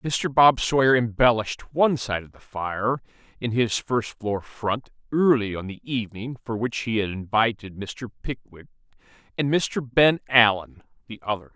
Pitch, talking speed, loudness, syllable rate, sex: 115 Hz, 160 wpm, -23 LUFS, 4.6 syllables/s, male